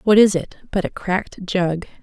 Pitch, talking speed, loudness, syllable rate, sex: 190 Hz, 210 wpm, -20 LUFS, 5.0 syllables/s, female